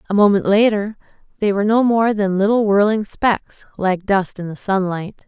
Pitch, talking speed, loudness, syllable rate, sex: 205 Hz, 180 wpm, -17 LUFS, 4.8 syllables/s, female